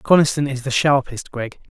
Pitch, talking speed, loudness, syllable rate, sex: 135 Hz, 165 wpm, -19 LUFS, 5.3 syllables/s, male